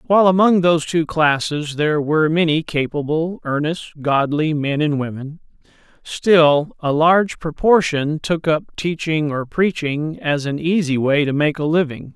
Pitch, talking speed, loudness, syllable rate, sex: 155 Hz, 155 wpm, -18 LUFS, 4.6 syllables/s, male